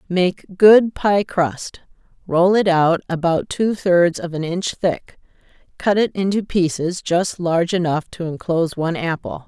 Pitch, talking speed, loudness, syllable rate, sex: 175 Hz, 150 wpm, -18 LUFS, 4.3 syllables/s, female